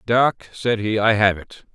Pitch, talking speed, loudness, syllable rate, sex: 110 Hz, 205 wpm, -19 LUFS, 3.9 syllables/s, male